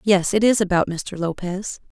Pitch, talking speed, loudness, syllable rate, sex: 190 Hz, 185 wpm, -21 LUFS, 4.6 syllables/s, female